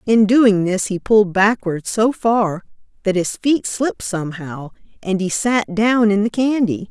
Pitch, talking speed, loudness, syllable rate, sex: 205 Hz, 175 wpm, -17 LUFS, 4.3 syllables/s, female